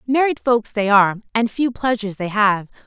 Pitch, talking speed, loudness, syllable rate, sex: 220 Hz, 190 wpm, -18 LUFS, 5.6 syllables/s, female